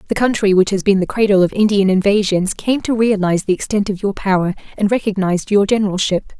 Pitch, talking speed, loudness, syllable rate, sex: 200 Hz, 205 wpm, -16 LUFS, 6.3 syllables/s, female